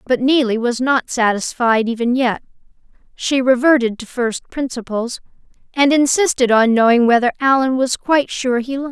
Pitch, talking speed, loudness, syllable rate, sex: 250 Hz, 160 wpm, -16 LUFS, 5.2 syllables/s, female